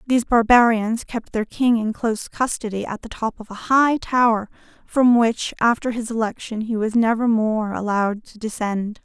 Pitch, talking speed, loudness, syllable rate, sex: 225 Hz, 180 wpm, -20 LUFS, 4.9 syllables/s, female